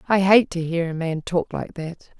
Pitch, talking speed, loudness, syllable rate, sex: 175 Hz, 245 wpm, -21 LUFS, 5.0 syllables/s, female